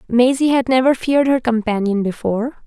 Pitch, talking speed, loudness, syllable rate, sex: 245 Hz, 160 wpm, -17 LUFS, 5.8 syllables/s, female